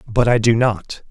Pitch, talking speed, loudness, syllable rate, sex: 115 Hz, 215 wpm, -16 LUFS, 4.3 syllables/s, male